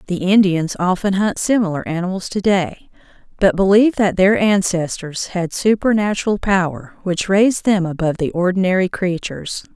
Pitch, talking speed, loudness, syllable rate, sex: 190 Hz, 140 wpm, -17 LUFS, 5.2 syllables/s, female